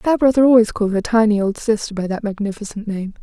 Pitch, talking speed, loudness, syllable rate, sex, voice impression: 215 Hz, 205 wpm, -17 LUFS, 7.0 syllables/s, female, feminine, slightly adult-like, slightly thin, soft, muffled, reassuring, slightly sweet, kind, slightly modest